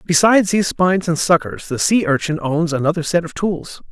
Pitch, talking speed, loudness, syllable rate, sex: 170 Hz, 200 wpm, -17 LUFS, 5.6 syllables/s, male